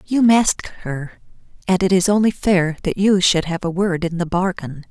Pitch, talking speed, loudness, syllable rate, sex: 185 Hz, 210 wpm, -18 LUFS, 4.7 syllables/s, female